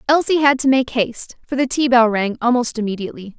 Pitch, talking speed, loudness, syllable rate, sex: 245 Hz, 215 wpm, -17 LUFS, 6.2 syllables/s, female